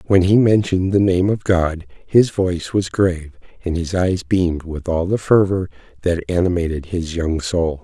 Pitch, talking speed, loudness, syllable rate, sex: 90 Hz, 185 wpm, -18 LUFS, 4.7 syllables/s, male